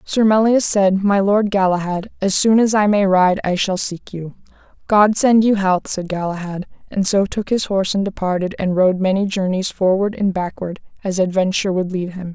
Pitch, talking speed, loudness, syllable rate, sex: 195 Hz, 200 wpm, -17 LUFS, 5.0 syllables/s, female